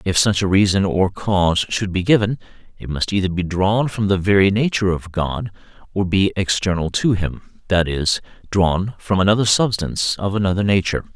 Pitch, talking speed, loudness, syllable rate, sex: 95 Hz, 180 wpm, -19 LUFS, 5.2 syllables/s, male